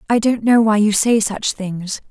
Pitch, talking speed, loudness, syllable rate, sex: 215 Hz, 230 wpm, -16 LUFS, 4.3 syllables/s, female